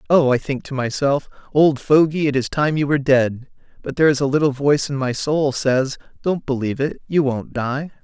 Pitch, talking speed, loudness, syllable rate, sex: 140 Hz, 215 wpm, -19 LUFS, 5.4 syllables/s, male